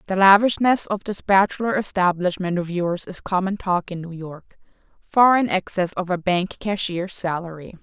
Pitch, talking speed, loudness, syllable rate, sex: 185 Hz, 160 wpm, -21 LUFS, 4.7 syllables/s, female